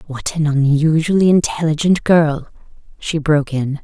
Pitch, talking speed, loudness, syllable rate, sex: 155 Hz, 125 wpm, -16 LUFS, 4.7 syllables/s, female